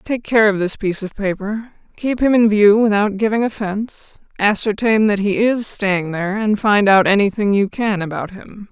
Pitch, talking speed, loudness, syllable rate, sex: 205 Hz, 195 wpm, -16 LUFS, 4.9 syllables/s, female